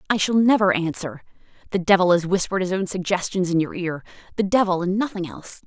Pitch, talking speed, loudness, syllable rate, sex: 185 Hz, 200 wpm, -21 LUFS, 6.4 syllables/s, female